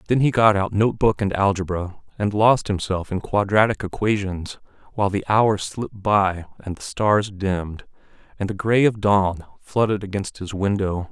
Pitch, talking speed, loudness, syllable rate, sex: 100 Hz, 175 wpm, -21 LUFS, 4.7 syllables/s, male